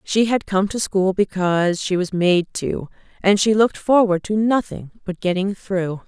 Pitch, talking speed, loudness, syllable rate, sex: 195 Hz, 190 wpm, -19 LUFS, 4.6 syllables/s, female